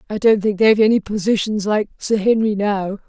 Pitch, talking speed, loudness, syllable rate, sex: 210 Hz, 195 wpm, -17 LUFS, 5.5 syllables/s, female